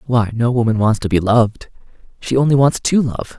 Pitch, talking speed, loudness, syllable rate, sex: 120 Hz, 215 wpm, -16 LUFS, 5.5 syllables/s, male